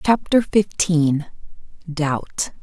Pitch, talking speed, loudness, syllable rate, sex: 170 Hz, 70 wpm, -20 LUFS, 2.7 syllables/s, female